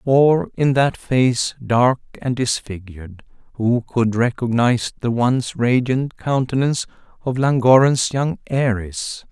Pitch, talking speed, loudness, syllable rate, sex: 125 Hz, 115 wpm, -19 LUFS, 3.9 syllables/s, male